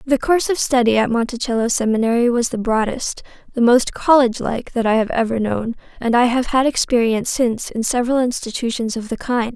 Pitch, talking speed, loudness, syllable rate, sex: 240 Hz, 195 wpm, -18 LUFS, 5.9 syllables/s, female